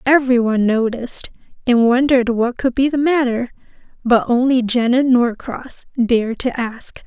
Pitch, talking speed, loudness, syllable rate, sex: 245 Hz, 145 wpm, -16 LUFS, 4.9 syllables/s, female